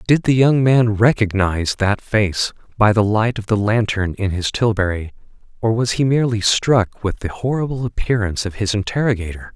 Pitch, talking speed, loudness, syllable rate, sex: 105 Hz, 175 wpm, -18 LUFS, 5.2 syllables/s, male